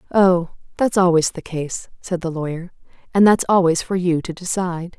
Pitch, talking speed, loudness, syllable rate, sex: 175 Hz, 180 wpm, -19 LUFS, 5.1 syllables/s, female